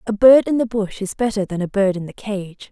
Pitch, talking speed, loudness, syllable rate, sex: 210 Hz, 290 wpm, -18 LUFS, 5.5 syllables/s, female